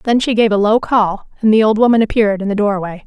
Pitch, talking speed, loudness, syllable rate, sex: 215 Hz, 275 wpm, -14 LUFS, 6.2 syllables/s, female